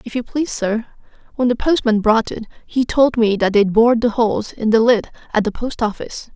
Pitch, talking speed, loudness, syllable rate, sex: 230 Hz, 225 wpm, -17 LUFS, 5.7 syllables/s, female